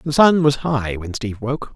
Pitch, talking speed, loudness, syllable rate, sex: 130 Hz, 240 wpm, -19 LUFS, 4.7 syllables/s, male